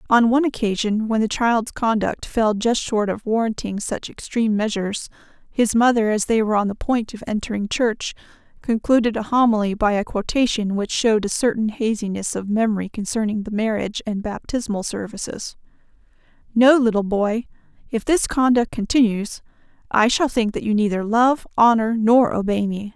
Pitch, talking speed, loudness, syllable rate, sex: 220 Hz, 165 wpm, -20 LUFS, 5.2 syllables/s, female